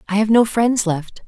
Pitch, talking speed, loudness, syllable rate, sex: 210 Hz, 235 wpm, -17 LUFS, 4.5 syllables/s, female